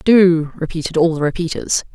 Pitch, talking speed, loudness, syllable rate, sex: 165 Hz, 155 wpm, -17 LUFS, 5.2 syllables/s, female